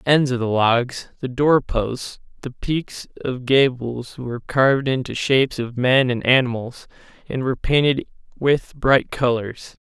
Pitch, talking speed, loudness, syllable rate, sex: 130 Hz, 160 wpm, -20 LUFS, 4.2 syllables/s, male